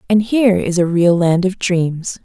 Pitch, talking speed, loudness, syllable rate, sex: 185 Hz, 215 wpm, -15 LUFS, 4.4 syllables/s, female